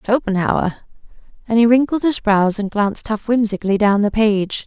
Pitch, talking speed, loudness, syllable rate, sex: 215 Hz, 165 wpm, -17 LUFS, 5.1 syllables/s, female